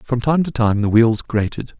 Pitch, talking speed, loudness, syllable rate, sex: 120 Hz, 235 wpm, -17 LUFS, 4.7 syllables/s, male